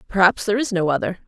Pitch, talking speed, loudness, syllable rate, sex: 190 Hz, 235 wpm, -20 LUFS, 7.5 syllables/s, female